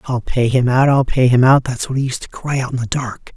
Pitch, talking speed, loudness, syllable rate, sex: 125 Hz, 320 wpm, -16 LUFS, 5.5 syllables/s, male